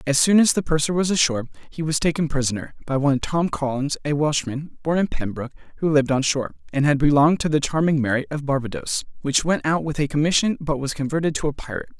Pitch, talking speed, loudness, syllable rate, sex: 150 Hz, 225 wpm, -21 LUFS, 6.6 syllables/s, male